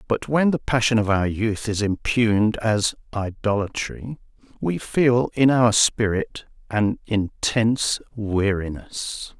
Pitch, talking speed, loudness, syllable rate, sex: 110 Hz, 120 wpm, -22 LUFS, 3.7 syllables/s, male